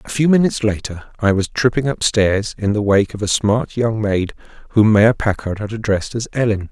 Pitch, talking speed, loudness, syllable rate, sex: 110 Hz, 215 wpm, -17 LUFS, 5.3 syllables/s, male